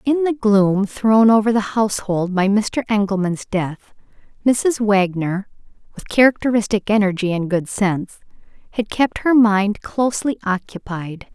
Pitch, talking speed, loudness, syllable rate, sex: 210 Hz, 130 wpm, -18 LUFS, 4.4 syllables/s, female